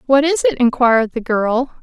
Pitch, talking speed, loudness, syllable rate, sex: 260 Hz, 195 wpm, -15 LUFS, 5.2 syllables/s, female